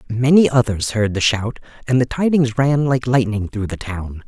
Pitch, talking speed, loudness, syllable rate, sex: 120 Hz, 195 wpm, -18 LUFS, 4.8 syllables/s, male